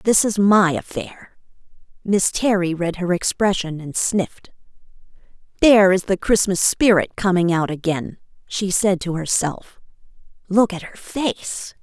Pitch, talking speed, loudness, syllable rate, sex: 185 Hz, 135 wpm, -19 LUFS, 4.2 syllables/s, female